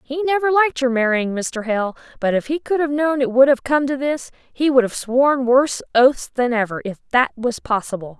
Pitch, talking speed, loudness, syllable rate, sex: 260 Hz, 225 wpm, -19 LUFS, 5.1 syllables/s, female